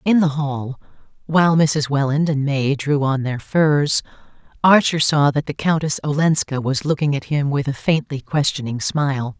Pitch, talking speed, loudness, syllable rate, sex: 145 Hz, 170 wpm, -19 LUFS, 4.6 syllables/s, female